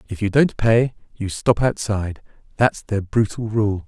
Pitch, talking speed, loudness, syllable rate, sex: 105 Hz, 170 wpm, -20 LUFS, 4.5 syllables/s, male